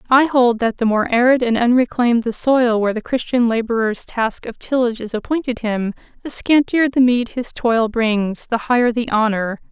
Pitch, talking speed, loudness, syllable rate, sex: 235 Hz, 180 wpm, -17 LUFS, 5.0 syllables/s, female